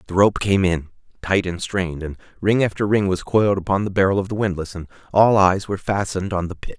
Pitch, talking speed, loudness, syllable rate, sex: 95 Hz, 240 wpm, -20 LUFS, 6.2 syllables/s, male